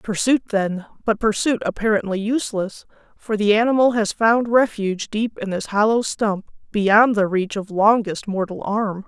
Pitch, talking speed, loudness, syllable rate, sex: 210 Hz, 160 wpm, -20 LUFS, 4.6 syllables/s, female